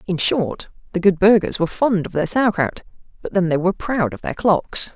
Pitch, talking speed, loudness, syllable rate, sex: 185 Hz, 230 wpm, -19 LUFS, 5.3 syllables/s, female